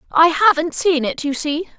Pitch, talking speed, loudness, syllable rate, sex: 320 Hz, 200 wpm, -17 LUFS, 4.6 syllables/s, female